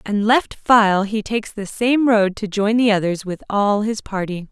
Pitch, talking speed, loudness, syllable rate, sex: 210 Hz, 210 wpm, -18 LUFS, 4.4 syllables/s, female